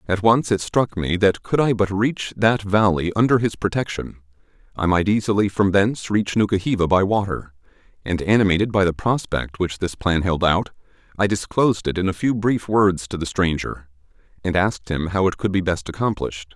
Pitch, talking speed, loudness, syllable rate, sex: 95 Hz, 195 wpm, -20 LUFS, 5.4 syllables/s, male